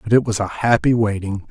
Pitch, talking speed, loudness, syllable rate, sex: 110 Hz, 240 wpm, -18 LUFS, 5.5 syllables/s, male